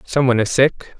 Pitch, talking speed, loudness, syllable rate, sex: 130 Hz, 180 wpm, -16 LUFS, 5.6 syllables/s, male